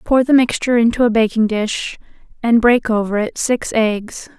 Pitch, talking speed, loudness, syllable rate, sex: 230 Hz, 180 wpm, -16 LUFS, 4.8 syllables/s, female